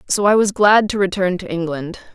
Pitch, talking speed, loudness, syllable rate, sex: 190 Hz, 225 wpm, -17 LUFS, 5.5 syllables/s, female